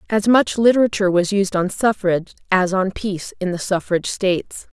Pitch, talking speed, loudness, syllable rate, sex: 195 Hz, 175 wpm, -19 LUFS, 5.6 syllables/s, female